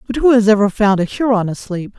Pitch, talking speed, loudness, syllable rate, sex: 215 Hz, 240 wpm, -14 LUFS, 6.0 syllables/s, female